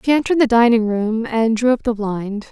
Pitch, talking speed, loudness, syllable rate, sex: 230 Hz, 240 wpm, -17 LUFS, 5.4 syllables/s, female